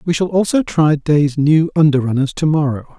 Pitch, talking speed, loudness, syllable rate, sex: 150 Hz, 200 wpm, -15 LUFS, 5.0 syllables/s, male